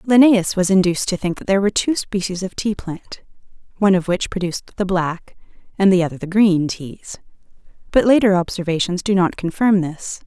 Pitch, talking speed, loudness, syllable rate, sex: 190 Hz, 185 wpm, -18 LUFS, 5.6 syllables/s, female